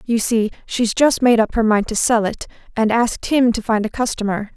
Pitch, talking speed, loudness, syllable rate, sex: 225 Hz, 235 wpm, -18 LUFS, 5.2 syllables/s, female